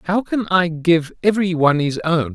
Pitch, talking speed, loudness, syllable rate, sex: 170 Hz, 205 wpm, -18 LUFS, 5.0 syllables/s, male